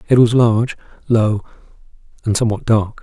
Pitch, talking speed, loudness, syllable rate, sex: 115 Hz, 140 wpm, -16 LUFS, 5.4 syllables/s, male